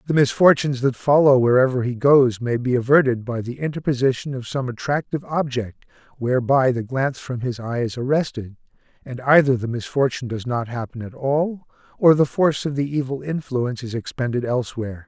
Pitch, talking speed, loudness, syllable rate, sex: 130 Hz, 175 wpm, -20 LUFS, 5.8 syllables/s, male